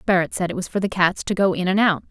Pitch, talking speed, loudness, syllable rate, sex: 185 Hz, 340 wpm, -21 LUFS, 6.7 syllables/s, female